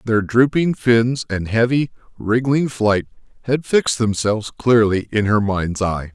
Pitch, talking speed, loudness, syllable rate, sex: 115 Hz, 145 wpm, -18 LUFS, 4.2 syllables/s, male